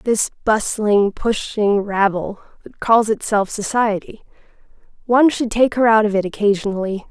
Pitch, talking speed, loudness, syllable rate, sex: 215 Hz, 125 wpm, -17 LUFS, 4.7 syllables/s, female